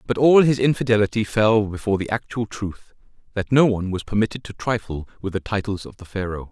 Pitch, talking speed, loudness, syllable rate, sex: 105 Hz, 195 wpm, -21 LUFS, 6.0 syllables/s, male